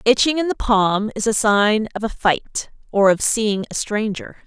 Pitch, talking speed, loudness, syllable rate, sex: 215 Hz, 200 wpm, -19 LUFS, 4.3 syllables/s, female